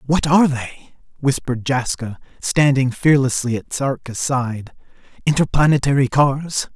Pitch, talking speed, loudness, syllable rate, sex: 135 Hz, 105 wpm, -18 LUFS, 4.6 syllables/s, male